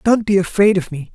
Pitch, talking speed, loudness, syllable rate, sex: 190 Hz, 260 wpm, -16 LUFS, 5.7 syllables/s, male